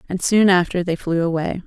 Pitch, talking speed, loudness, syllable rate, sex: 175 Hz, 215 wpm, -18 LUFS, 5.4 syllables/s, female